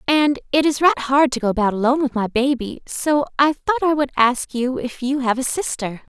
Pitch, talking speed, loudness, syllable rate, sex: 265 Hz, 235 wpm, -19 LUFS, 5.4 syllables/s, female